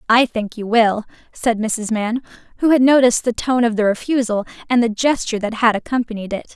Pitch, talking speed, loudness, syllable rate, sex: 230 Hz, 200 wpm, -18 LUFS, 5.7 syllables/s, female